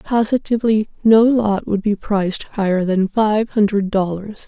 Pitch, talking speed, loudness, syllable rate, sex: 210 Hz, 150 wpm, -17 LUFS, 4.6 syllables/s, female